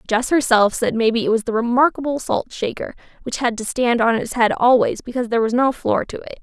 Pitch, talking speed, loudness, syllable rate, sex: 240 Hz, 235 wpm, -18 LUFS, 6.0 syllables/s, female